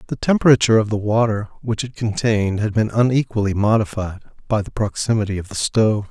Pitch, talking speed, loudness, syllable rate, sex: 110 Hz, 175 wpm, -19 LUFS, 6.2 syllables/s, male